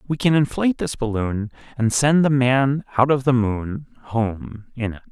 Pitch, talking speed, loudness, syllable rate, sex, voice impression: 125 Hz, 190 wpm, -20 LUFS, 4.5 syllables/s, male, very masculine, very adult-like, old, very thick, slightly relaxed, powerful, slightly bright, soft, slightly muffled, fluent, raspy, cool, very intellectual, very sincere, calm, very mature, very friendly, very reassuring, very unique, elegant, wild, sweet, lively, kind, intense, slightly modest